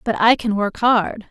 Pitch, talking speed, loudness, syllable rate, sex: 215 Hz, 230 wpm, -17 LUFS, 4.3 syllables/s, female